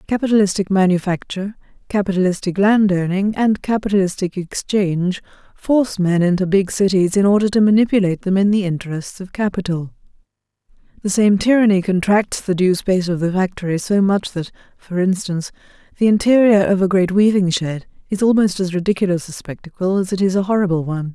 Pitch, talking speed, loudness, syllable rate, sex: 190 Hz, 160 wpm, -17 LUFS, 5.9 syllables/s, female